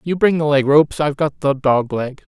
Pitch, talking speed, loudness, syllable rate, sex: 145 Hz, 230 wpm, -17 LUFS, 5.6 syllables/s, male